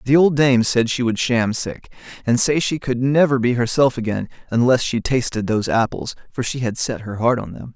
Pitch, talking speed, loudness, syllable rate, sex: 125 Hz, 225 wpm, -19 LUFS, 5.2 syllables/s, male